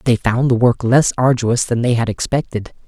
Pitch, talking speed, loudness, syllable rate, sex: 120 Hz, 210 wpm, -16 LUFS, 5.0 syllables/s, male